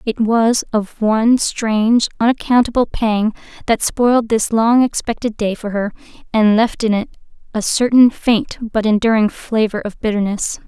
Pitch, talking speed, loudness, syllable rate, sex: 225 Hz, 150 wpm, -16 LUFS, 4.6 syllables/s, female